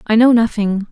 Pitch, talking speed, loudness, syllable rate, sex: 220 Hz, 195 wpm, -14 LUFS, 5.3 syllables/s, female